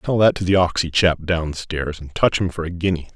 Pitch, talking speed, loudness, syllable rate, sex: 85 Hz, 250 wpm, -20 LUFS, 5.3 syllables/s, male